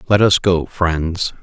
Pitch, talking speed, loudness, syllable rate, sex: 90 Hz, 170 wpm, -16 LUFS, 3.3 syllables/s, male